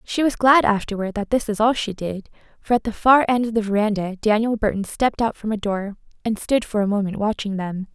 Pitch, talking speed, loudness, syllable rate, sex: 215 Hz, 240 wpm, -21 LUFS, 5.7 syllables/s, female